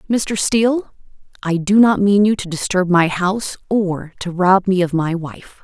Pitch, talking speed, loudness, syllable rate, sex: 190 Hz, 190 wpm, -17 LUFS, 4.4 syllables/s, female